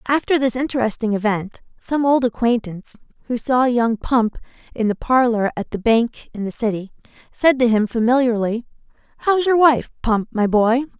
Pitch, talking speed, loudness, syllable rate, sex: 240 Hz, 165 wpm, -19 LUFS, 5.0 syllables/s, female